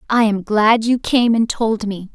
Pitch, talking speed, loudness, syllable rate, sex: 220 Hz, 225 wpm, -16 LUFS, 4.2 syllables/s, female